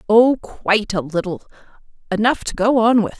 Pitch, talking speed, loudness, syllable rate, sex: 215 Hz, 170 wpm, -18 LUFS, 5.1 syllables/s, female